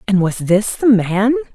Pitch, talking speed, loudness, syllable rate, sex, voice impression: 215 Hz, 195 wpm, -15 LUFS, 4.0 syllables/s, female, feminine, very adult-like, slightly soft, calm, elegant, slightly sweet